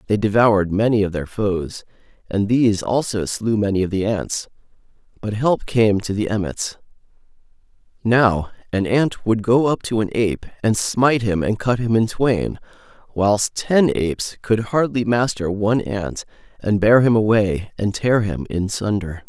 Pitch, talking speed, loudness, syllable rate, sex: 105 Hz, 170 wpm, -19 LUFS, 4.5 syllables/s, male